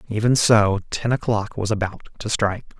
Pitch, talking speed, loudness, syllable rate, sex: 105 Hz, 170 wpm, -21 LUFS, 5.4 syllables/s, male